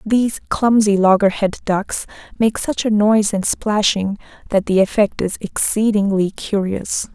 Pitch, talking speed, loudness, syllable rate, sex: 205 Hz, 135 wpm, -17 LUFS, 4.5 syllables/s, female